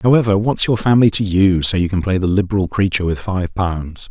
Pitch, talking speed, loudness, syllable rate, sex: 95 Hz, 235 wpm, -16 LUFS, 5.9 syllables/s, male